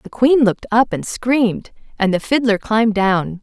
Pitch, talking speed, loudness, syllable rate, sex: 220 Hz, 195 wpm, -16 LUFS, 4.8 syllables/s, female